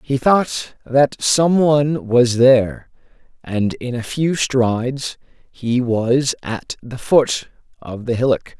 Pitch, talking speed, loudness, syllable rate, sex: 125 Hz, 140 wpm, -17 LUFS, 3.4 syllables/s, male